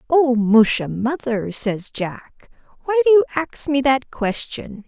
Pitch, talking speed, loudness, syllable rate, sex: 255 Hz, 150 wpm, -19 LUFS, 3.6 syllables/s, female